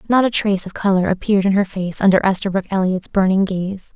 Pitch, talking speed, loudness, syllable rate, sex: 195 Hz, 210 wpm, -18 LUFS, 6.2 syllables/s, female